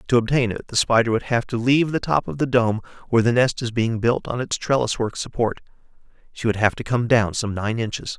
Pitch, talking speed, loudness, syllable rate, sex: 120 Hz, 250 wpm, -21 LUFS, 5.8 syllables/s, male